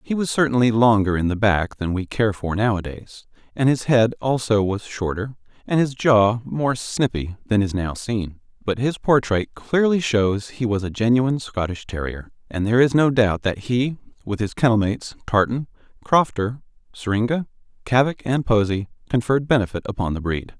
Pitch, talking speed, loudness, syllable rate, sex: 115 Hz, 175 wpm, -21 LUFS, 5.0 syllables/s, male